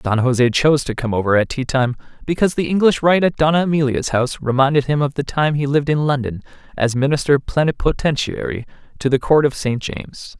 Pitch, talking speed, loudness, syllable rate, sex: 140 Hz, 200 wpm, -18 LUFS, 6.0 syllables/s, male